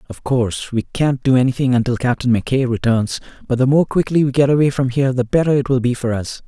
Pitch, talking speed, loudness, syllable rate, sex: 130 Hz, 240 wpm, -17 LUFS, 6.3 syllables/s, male